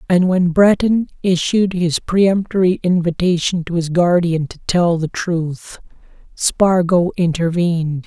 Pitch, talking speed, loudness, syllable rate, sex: 175 Hz, 120 wpm, -16 LUFS, 4.0 syllables/s, male